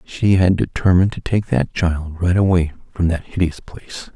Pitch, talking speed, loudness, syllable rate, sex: 90 Hz, 190 wpm, -18 LUFS, 5.0 syllables/s, male